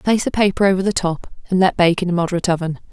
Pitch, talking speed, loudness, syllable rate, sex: 185 Hz, 265 wpm, -18 LUFS, 7.6 syllables/s, female